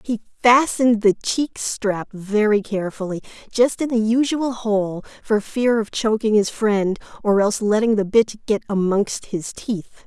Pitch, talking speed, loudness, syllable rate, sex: 215 Hz, 160 wpm, -20 LUFS, 4.4 syllables/s, female